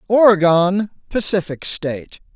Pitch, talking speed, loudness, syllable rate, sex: 185 Hz, 75 wpm, -17 LUFS, 4.3 syllables/s, male